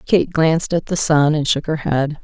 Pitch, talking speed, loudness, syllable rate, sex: 155 Hz, 240 wpm, -17 LUFS, 4.7 syllables/s, female